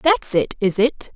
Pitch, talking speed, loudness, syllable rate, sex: 235 Hz, 210 wpm, -19 LUFS, 3.9 syllables/s, female